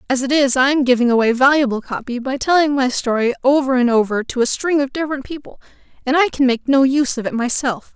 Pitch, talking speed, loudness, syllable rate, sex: 265 Hz, 235 wpm, -17 LUFS, 6.2 syllables/s, female